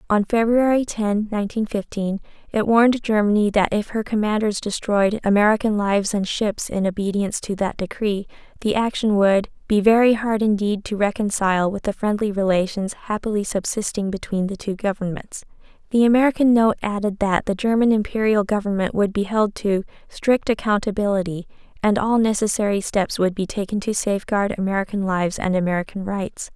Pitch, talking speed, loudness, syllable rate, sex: 205 Hz, 160 wpm, -21 LUFS, 5.4 syllables/s, female